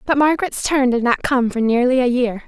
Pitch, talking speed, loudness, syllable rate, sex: 255 Hz, 240 wpm, -17 LUFS, 5.6 syllables/s, female